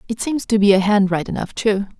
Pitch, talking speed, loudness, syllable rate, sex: 205 Hz, 270 wpm, -18 LUFS, 5.9 syllables/s, female